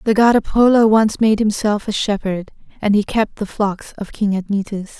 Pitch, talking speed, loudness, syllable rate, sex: 210 Hz, 190 wpm, -17 LUFS, 4.8 syllables/s, female